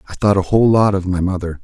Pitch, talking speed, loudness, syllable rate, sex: 95 Hz, 295 wpm, -15 LUFS, 6.9 syllables/s, male